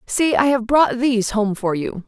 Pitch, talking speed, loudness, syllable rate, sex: 235 Hz, 230 wpm, -18 LUFS, 4.6 syllables/s, female